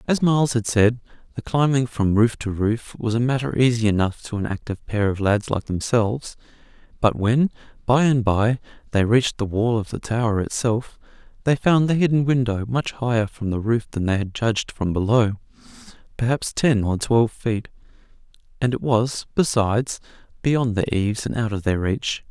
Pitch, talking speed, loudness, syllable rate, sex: 115 Hz, 180 wpm, -21 LUFS, 5.1 syllables/s, male